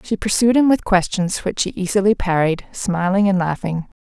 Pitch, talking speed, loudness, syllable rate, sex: 195 Hz, 180 wpm, -18 LUFS, 5.0 syllables/s, female